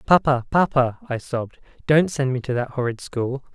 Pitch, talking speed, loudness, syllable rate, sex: 135 Hz, 185 wpm, -22 LUFS, 5.1 syllables/s, male